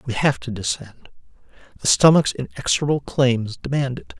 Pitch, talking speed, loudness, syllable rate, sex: 130 Hz, 145 wpm, -20 LUFS, 5.1 syllables/s, male